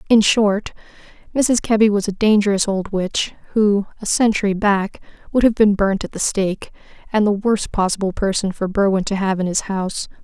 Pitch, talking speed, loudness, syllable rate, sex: 205 Hz, 190 wpm, -18 LUFS, 5.2 syllables/s, female